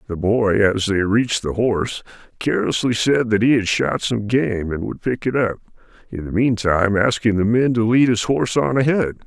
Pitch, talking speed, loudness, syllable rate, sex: 110 Hz, 205 wpm, -18 LUFS, 5.2 syllables/s, male